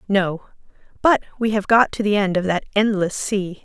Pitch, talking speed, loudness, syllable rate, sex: 200 Hz, 200 wpm, -19 LUFS, 4.9 syllables/s, female